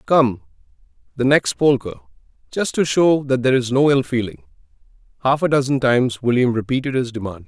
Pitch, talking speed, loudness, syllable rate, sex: 130 Hz, 160 wpm, -18 LUFS, 5.6 syllables/s, male